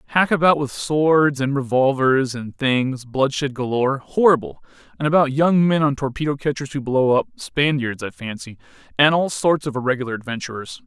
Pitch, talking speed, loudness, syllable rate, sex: 140 Hz, 140 wpm, -20 LUFS, 5.1 syllables/s, male